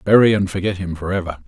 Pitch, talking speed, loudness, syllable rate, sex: 95 Hz, 245 wpm, -18 LUFS, 6.7 syllables/s, male